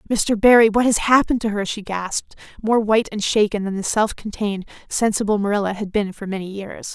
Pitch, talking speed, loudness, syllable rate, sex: 210 Hz, 200 wpm, -19 LUFS, 5.9 syllables/s, female